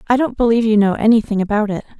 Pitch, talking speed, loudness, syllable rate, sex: 220 Hz, 240 wpm, -16 LUFS, 7.7 syllables/s, female